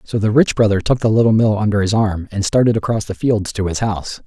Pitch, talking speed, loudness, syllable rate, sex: 105 Hz, 265 wpm, -16 LUFS, 6.1 syllables/s, male